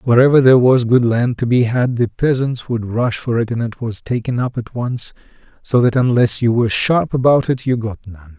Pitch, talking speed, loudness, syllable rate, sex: 120 Hz, 230 wpm, -16 LUFS, 5.2 syllables/s, male